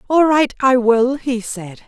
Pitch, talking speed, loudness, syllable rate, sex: 250 Hz, 190 wpm, -15 LUFS, 3.8 syllables/s, female